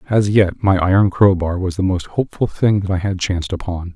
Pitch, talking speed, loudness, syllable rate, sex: 95 Hz, 210 wpm, -17 LUFS, 5.2 syllables/s, male